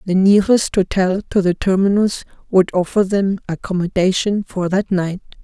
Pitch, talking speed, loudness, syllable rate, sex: 190 Hz, 145 wpm, -17 LUFS, 4.9 syllables/s, female